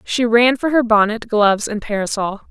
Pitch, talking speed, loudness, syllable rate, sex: 225 Hz, 190 wpm, -16 LUFS, 5.2 syllables/s, female